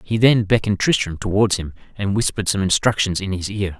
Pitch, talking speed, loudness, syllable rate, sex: 100 Hz, 205 wpm, -19 LUFS, 6.0 syllables/s, male